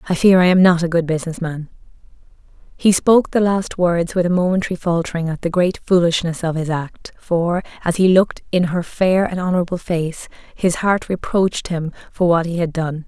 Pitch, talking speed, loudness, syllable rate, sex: 175 Hz, 200 wpm, -18 LUFS, 5.4 syllables/s, female